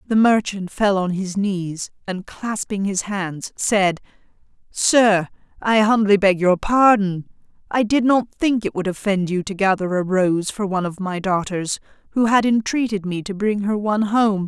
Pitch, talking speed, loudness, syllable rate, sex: 200 Hz, 180 wpm, -19 LUFS, 4.4 syllables/s, female